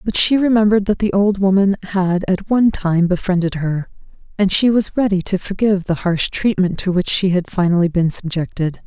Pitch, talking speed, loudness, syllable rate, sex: 190 Hz, 195 wpm, -17 LUFS, 5.4 syllables/s, female